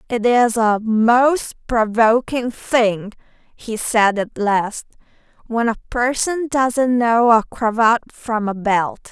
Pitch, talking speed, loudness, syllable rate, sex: 230 Hz, 110 wpm, -17 LUFS, 3.2 syllables/s, female